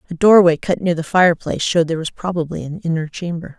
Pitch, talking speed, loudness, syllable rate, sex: 170 Hz, 220 wpm, -17 LUFS, 6.8 syllables/s, female